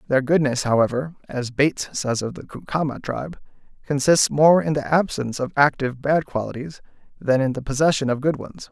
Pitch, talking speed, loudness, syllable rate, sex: 140 Hz, 180 wpm, -21 LUFS, 5.6 syllables/s, male